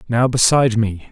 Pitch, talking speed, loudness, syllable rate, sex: 115 Hz, 160 wpm, -16 LUFS, 5.3 syllables/s, male